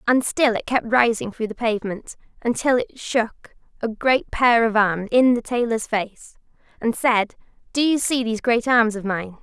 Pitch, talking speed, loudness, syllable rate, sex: 230 Hz, 190 wpm, -21 LUFS, 4.6 syllables/s, female